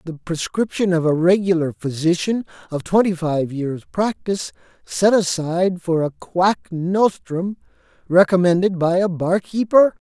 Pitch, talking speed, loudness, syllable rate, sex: 175 Hz, 130 wpm, -19 LUFS, 4.4 syllables/s, male